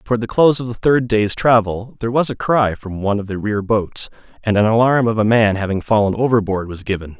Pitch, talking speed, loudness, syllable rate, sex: 110 Hz, 240 wpm, -17 LUFS, 5.9 syllables/s, male